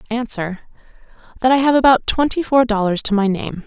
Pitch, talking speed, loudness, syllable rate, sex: 235 Hz, 165 wpm, -17 LUFS, 5.5 syllables/s, female